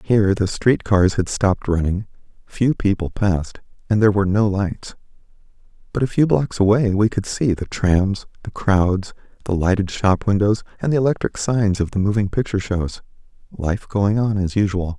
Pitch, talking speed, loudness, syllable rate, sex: 100 Hz, 175 wpm, -19 LUFS, 5.1 syllables/s, male